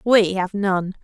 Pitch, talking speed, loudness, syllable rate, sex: 195 Hz, 175 wpm, -20 LUFS, 3.3 syllables/s, female